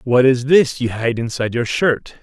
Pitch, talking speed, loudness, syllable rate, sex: 125 Hz, 215 wpm, -17 LUFS, 4.9 syllables/s, male